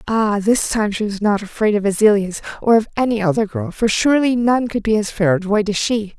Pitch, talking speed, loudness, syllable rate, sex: 215 Hz, 245 wpm, -17 LUFS, 5.8 syllables/s, female